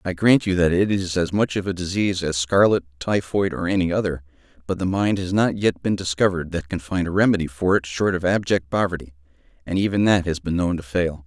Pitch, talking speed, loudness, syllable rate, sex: 90 Hz, 235 wpm, -21 LUFS, 5.9 syllables/s, male